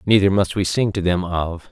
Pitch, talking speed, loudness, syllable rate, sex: 95 Hz, 245 wpm, -19 LUFS, 5.1 syllables/s, male